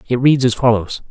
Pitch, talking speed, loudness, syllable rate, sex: 120 Hz, 215 wpm, -15 LUFS, 5.4 syllables/s, male